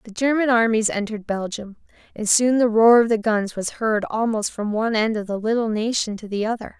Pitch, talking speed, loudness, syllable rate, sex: 220 Hz, 220 wpm, -20 LUFS, 5.6 syllables/s, female